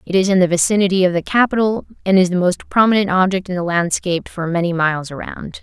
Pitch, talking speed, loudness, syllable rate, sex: 185 Hz, 225 wpm, -16 LUFS, 6.4 syllables/s, female